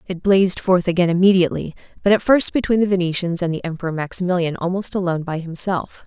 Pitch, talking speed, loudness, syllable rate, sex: 180 Hz, 190 wpm, -19 LUFS, 6.6 syllables/s, female